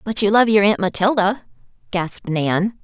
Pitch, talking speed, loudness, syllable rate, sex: 200 Hz, 170 wpm, -18 LUFS, 4.8 syllables/s, female